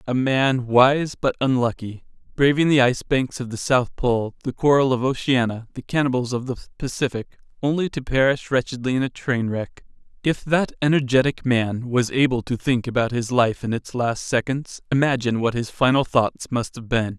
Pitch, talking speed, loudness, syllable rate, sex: 125 Hz, 185 wpm, -21 LUFS, 5.1 syllables/s, male